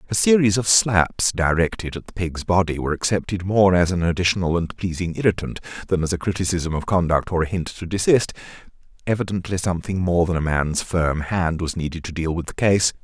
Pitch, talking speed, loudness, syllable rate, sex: 90 Hz, 205 wpm, -21 LUFS, 5.7 syllables/s, male